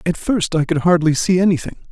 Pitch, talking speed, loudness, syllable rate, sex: 170 Hz, 220 wpm, -17 LUFS, 6.0 syllables/s, male